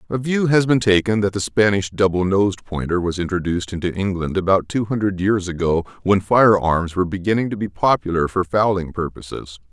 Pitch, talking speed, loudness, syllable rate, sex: 95 Hz, 190 wpm, -19 LUFS, 5.7 syllables/s, male